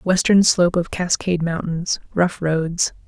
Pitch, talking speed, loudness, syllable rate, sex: 175 Hz, 115 wpm, -19 LUFS, 4.3 syllables/s, female